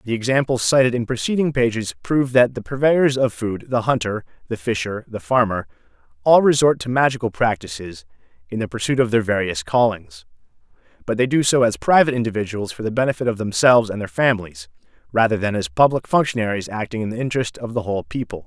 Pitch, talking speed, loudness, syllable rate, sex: 115 Hz, 180 wpm, -19 LUFS, 6.2 syllables/s, male